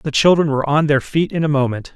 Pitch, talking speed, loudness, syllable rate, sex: 145 Hz, 275 wpm, -17 LUFS, 6.3 syllables/s, male